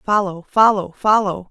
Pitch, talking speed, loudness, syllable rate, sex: 195 Hz, 120 wpm, -17 LUFS, 4.3 syllables/s, female